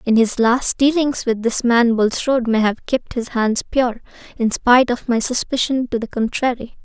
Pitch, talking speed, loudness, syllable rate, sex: 240 Hz, 195 wpm, -18 LUFS, 4.7 syllables/s, female